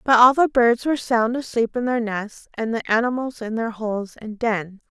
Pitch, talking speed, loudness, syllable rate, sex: 230 Hz, 215 wpm, -21 LUFS, 5.0 syllables/s, female